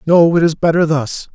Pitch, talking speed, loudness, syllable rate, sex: 160 Hz, 220 wpm, -13 LUFS, 5.1 syllables/s, male